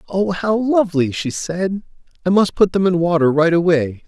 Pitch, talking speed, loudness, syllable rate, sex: 180 Hz, 190 wpm, -17 LUFS, 4.9 syllables/s, male